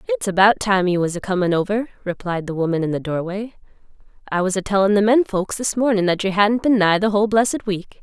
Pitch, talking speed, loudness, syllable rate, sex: 195 Hz, 230 wpm, -19 LUFS, 6.1 syllables/s, female